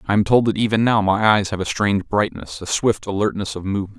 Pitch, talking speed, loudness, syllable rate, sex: 100 Hz, 255 wpm, -19 LUFS, 6.2 syllables/s, male